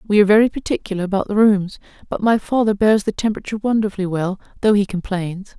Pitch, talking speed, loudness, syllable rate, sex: 205 Hz, 195 wpm, -18 LUFS, 6.7 syllables/s, female